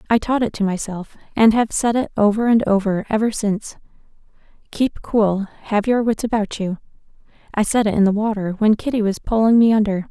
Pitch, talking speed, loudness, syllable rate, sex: 215 Hz, 190 wpm, -18 LUFS, 5.5 syllables/s, female